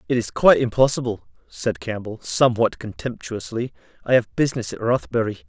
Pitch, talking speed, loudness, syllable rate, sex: 115 Hz, 140 wpm, -21 LUFS, 5.7 syllables/s, male